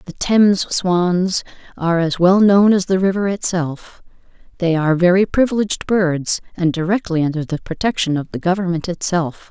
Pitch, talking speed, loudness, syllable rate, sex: 180 Hz, 160 wpm, -17 LUFS, 5.1 syllables/s, female